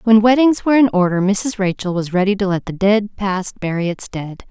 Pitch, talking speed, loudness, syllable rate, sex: 200 Hz, 225 wpm, -17 LUFS, 5.4 syllables/s, female